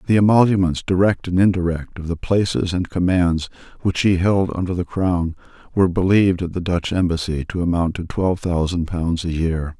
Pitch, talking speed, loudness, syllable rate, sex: 90 Hz, 185 wpm, -19 LUFS, 5.3 syllables/s, male